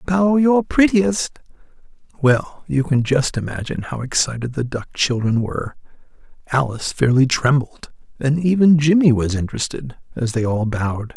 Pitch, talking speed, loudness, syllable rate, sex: 140 Hz, 140 wpm, -18 LUFS, 4.9 syllables/s, male